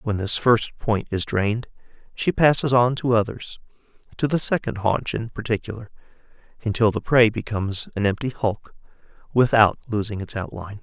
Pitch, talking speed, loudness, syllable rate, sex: 115 Hz, 155 wpm, -22 LUFS, 5.2 syllables/s, male